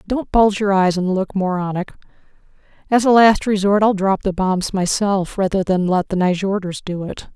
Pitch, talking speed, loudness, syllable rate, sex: 195 Hz, 190 wpm, -17 LUFS, 5.0 syllables/s, female